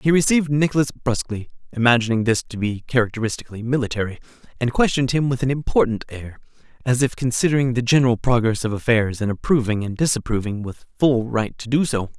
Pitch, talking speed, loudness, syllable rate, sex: 125 Hz, 170 wpm, -20 LUFS, 5.0 syllables/s, male